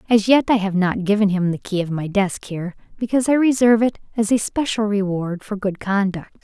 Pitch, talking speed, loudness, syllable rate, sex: 205 Hz, 225 wpm, -19 LUFS, 5.8 syllables/s, female